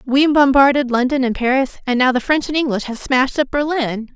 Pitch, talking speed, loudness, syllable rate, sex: 265 Hz, 215 wpm, -16 LUFS, 5.7 syllables/s, female